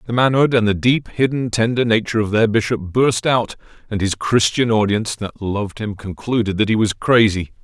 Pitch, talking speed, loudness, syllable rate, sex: 110 Hz, 195 wpm, -18 LUFS, 5.4 syllables/s, male